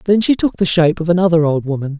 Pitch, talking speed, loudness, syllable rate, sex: 170 Hz, 270 wpm, -15 LUFS, 7.0 syllables/s, male